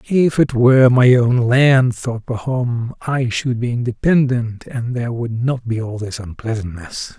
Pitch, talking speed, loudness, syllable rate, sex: 120 Hz, 165 wpm, -17 LUFS, 4.2 syllables/s, male